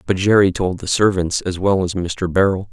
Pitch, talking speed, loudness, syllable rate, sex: 95 Hz, 220 wpm, -17 LUFS, 5.1 syllables/s, male